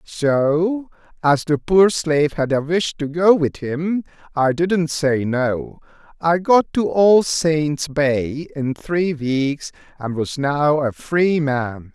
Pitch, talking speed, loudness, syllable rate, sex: 155 Hz, 160 wpm, -19 LUFS, 3.2 syllables/s, male